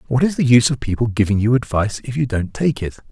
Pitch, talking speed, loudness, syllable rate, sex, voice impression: 120 Hz, 270 wpm, -18 LUFS, 6.8 syllables/s, male, masculine, adult-like, halting, intellectual, slightly refreshing, friendly, wild, kind, light